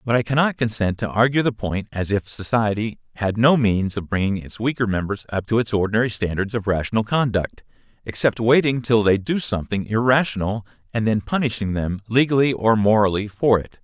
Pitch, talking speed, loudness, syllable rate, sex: 110 Hz, 185 wpm, -21 LUFS, 5.6 syllables/s, male